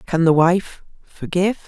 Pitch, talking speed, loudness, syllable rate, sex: 175 Hz, 110 wpm, -18 LUFS, 4.4 syllables/s, female